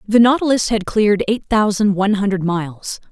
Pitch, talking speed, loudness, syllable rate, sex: 205 Hz, 175 wpm, -16 LUFS, 5.6 syllables/s, female